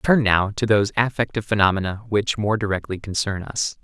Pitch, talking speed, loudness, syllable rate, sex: 105 Hz, 170 wpm, -21 LUFS, 5.8 syllables/s, male